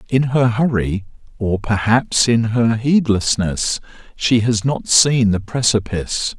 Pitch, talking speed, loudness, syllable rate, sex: 115 Hz, 130 wpm, -17 LUFS, 3.8 syllables/s, male